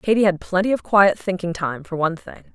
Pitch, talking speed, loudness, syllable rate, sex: 185 Hz, 235 wpm, -20 LUFS, 5.6 syllables/s, female